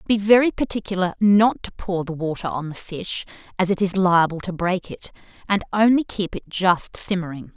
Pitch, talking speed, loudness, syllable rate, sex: 190 Hz, 190 wpm, -21 LUFS, 5.1 syllables/s, female